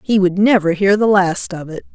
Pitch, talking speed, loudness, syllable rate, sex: 190 Hz, 245 wpm, -15 LUFS, 5.0 syllables/s, female